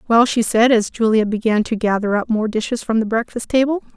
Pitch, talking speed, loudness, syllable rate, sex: 225 Hz, 225 wpm, -18 LUFS, 5.7 syllables/s, female